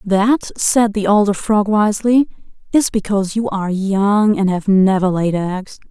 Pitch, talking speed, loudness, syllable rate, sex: 205 Hz, 165 wpm, -16 LUFS, 4.4 syllables/s, female